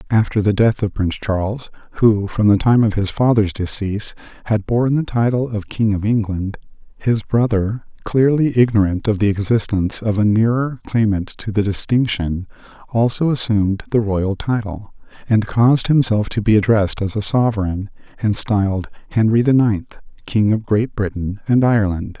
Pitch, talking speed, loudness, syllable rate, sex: 110 Hz, 165 wpm, -18 LUFS, 5.0 syllables/s, male